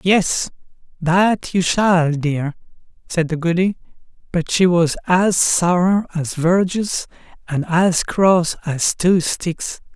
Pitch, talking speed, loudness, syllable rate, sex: 175 Hz, 125 wpm, -18 LUFS, 3.2 syllables/s, male